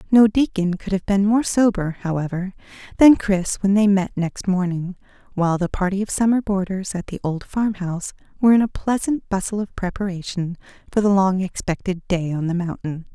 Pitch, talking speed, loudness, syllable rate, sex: 190 Hz, 185 wpm, -21 LUFS, 5.3 syllables/s, female